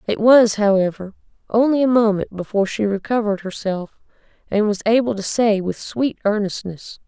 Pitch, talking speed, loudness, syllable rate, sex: 210 Hz, 155 wpm, -19 LUFS, 5.2 syllables/s, female